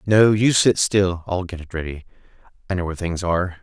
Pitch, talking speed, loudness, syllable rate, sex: 95 Hz, 215 wpm, -20 LUFS, 5.8 syllables/s, male